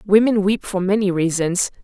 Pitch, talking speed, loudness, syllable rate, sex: 195 Hz, 165 wpm, -18 LUFS, 5.0 syllables/s, female